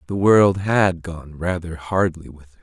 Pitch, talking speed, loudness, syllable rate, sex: 90 Hz, 185 wpm, -19 LUFS, 4.3 syllables/s, male